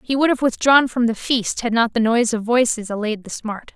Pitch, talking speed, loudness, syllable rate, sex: 235 Hz, 255 wpm, -19 LUFS, 5.5 syllables/s, female